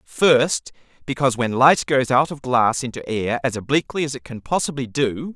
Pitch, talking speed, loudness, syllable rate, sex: 135 Hz, 190 wpm, -20 LUFS, 5.1 syllables/s, male